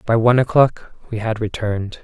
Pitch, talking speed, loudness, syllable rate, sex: 115 Hz, 175 wpm, -18 LUFS, 5.7 syllables/s, male